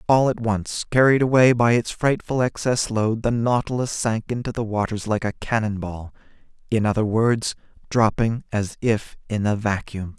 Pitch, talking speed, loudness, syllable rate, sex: 115 Hz, 165 wpm, -22 LUFS, 4.6 syllables/s, male